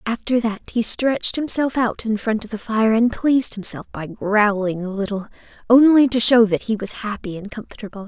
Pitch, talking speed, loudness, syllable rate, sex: 220 Hz, 200 wpm, -19 LUFS, 5.2 syllables/s, female